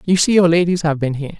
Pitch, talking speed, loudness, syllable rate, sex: 165 Hz, 300 wpm, -15 LUFS, 7.1 syllables/s, female